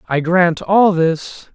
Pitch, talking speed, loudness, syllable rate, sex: 175 Hz, 155 wpm, -15 LUFS, 3.0 syllables/s, male